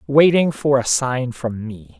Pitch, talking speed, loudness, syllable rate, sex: 130 Hz, 180 wpm, -18 LUFS, 3.8 syllables/s, male